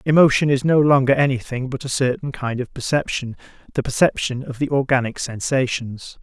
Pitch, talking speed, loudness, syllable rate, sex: 130 Hz, 165 wpm, -20 LUFS, 5.4 syllables/s, male